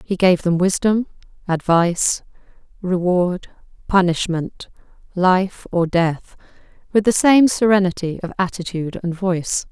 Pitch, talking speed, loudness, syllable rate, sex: 185 Hz, 110 wpm, -18 LUFS, 4.3 syllables/s, female